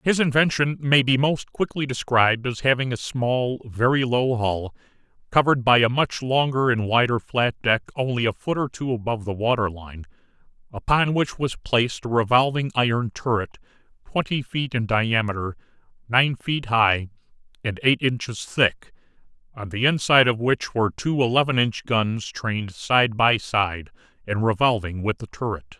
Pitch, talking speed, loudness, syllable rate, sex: 120 Hz, 165 wpm, -22 LUFS, 4.8 syllables/s, male